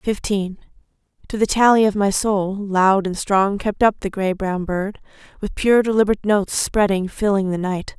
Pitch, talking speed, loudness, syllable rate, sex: 200 Hz, 180 wpm, -19 LUFS, 4.8 syllables/s, female